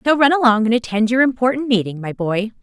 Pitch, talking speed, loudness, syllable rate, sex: 235 Hz, 230 wpm, -17 LUFS, 6.2 syllables/s, female